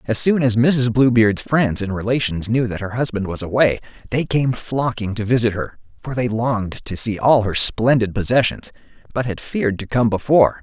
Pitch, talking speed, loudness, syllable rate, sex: 115 Hz, 200 wpm, -18 LUFS, 5.1 syllables/s, male